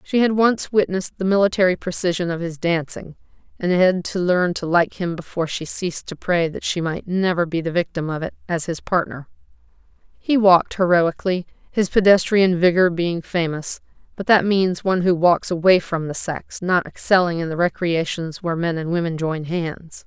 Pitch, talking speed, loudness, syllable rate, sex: 175 Hz, 190 wpm, -20 LUFS, 5.2 syllables/s, female